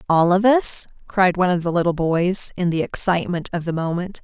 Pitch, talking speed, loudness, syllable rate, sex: 180 Hz, 215 wpm, -19 LUFS, 5.6 syllables/s, female